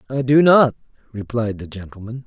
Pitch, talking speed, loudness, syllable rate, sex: 125 Hz, 160 wpm, -17 LUFS, 5.2 syllables/s, male